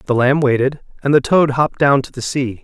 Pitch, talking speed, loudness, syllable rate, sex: 135 Hz, 250 wpm, -16 LUFS, 5.7 syllables/s, male